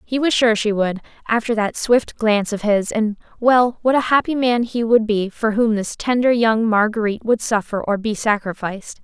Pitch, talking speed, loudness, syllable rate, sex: 220 Hz, 200 wpm, -18 LUFS, 5.0 syllables/s, female